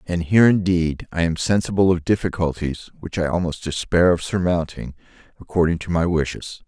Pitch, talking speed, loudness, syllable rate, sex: 85 Hz, 160 wpm, -20 LUFS, 5.4 syllables/s, male